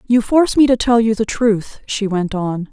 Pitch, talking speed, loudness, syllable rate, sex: 220 Hz, 245 wpm, -16 LUFS, 4.8 syllables/s, female